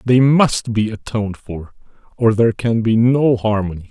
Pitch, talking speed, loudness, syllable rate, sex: 110 Hz, 170 wpm, -16 LUFS, 4.8 syllables/s, male